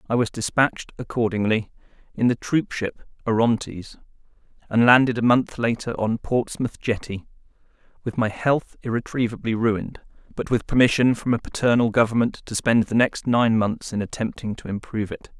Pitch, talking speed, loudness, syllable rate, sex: 115 Hz, 150 wpm, -22 LUFS, 5.2 syllables/s, male